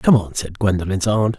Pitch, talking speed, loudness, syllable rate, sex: 100 Hz, 215 wpm, -19 LUFS, 5.2 syllables/s, male